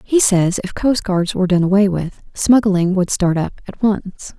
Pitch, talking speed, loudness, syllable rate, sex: 195 Hz, 190 wpm, -16 LUFS, 4.5 syllables/s, female